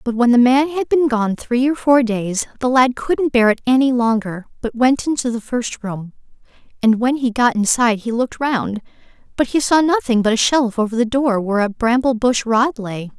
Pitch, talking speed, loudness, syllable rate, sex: 240 Hz, 220 wpm, -17 LUFS, 5.1 syllables/s, female